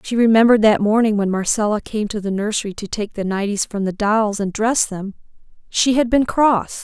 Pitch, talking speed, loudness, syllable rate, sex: 215 Hz, 210 wpm, -18 LUFS, 5.3 syllables/s, female